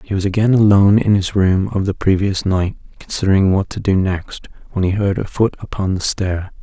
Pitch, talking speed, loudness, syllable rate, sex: 95 Hz, 215 wpm, -16 LUFS, 5.3 syllables/s, male